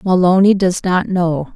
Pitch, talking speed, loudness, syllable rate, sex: 185 Hz, 155 wpm, -14 LUFS, 4.1 syllables/s, female